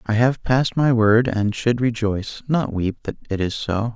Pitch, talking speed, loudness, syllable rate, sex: 115 Hz, 210 wpm, -20 LUFS, 4.7 syllables/s, male